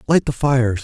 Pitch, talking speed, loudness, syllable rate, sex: 130 Hz, 215 wpm, -18 LUFS, 6.0 syllables/s, male